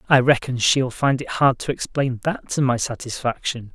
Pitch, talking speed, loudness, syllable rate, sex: 130 Hz, 190 wpm, -21 LUFS, 4.8 syllables/s, male